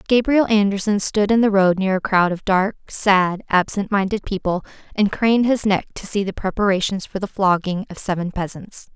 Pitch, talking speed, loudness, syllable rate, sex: 195 Hz, 195 wpm, -19 LUFS, 5.1 syllables/s, female